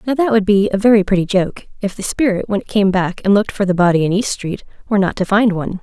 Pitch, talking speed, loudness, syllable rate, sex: 200 Hz, 290 wpm, -16 LUFS, 6.5 syllables/s, female